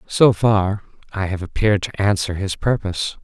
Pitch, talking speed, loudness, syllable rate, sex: 100 Hz, 165 wpm, -19 LUFS, 5.1 syllables/s, male